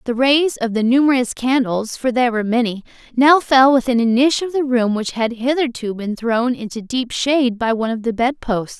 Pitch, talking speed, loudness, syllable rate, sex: 245 Hz, 220 wpm, -17 LUFS, 4.9 syllables/s, female